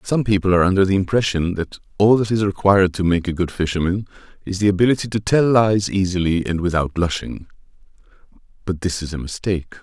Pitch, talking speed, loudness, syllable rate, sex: 95 Hz, 190 wpm, -19 LUFS, 6.2 syllables/s, male